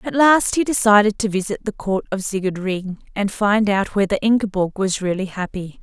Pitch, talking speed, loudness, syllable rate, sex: 205 Hz, 195 wpm, -19 LUFS, 5.2 syllables/s, female